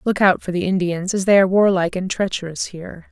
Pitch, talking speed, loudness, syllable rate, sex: 185 Hz, 230 wpm, -18 LUFS, 6.4 syllables/s, female